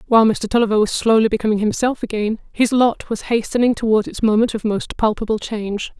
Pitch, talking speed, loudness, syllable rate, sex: 220 Hz, 190 wpm, -18 LUFS, 6.0 syllables/s, female